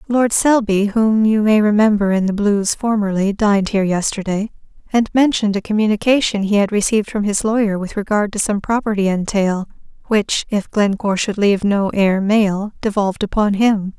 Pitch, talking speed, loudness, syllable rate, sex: 205 Hz, 170 wpm, -17 LUFS, 5.3 syllables/s, female